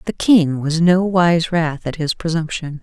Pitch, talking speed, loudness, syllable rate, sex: 165 Hz, 190 wpm, -17 LUFS, 4.1 syllables/s, female